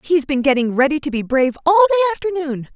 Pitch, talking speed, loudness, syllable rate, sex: 305 Hz, 220 wpm, -17 LUFS, 7.4 syllables/s, female